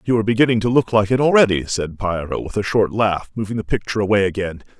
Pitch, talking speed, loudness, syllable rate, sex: 105 Hz, 240 wpm, -18 LUFS, 6.7 syllables/s, male